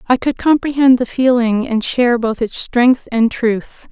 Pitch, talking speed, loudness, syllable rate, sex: 245 Hz, 185 wpm, -15 LUFS, 4.3 syllables/s, female